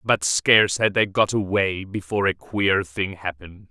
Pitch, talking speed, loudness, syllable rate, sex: 95 Hz, 180 wpm, -21 LUFS, 4.7 syllables/s, male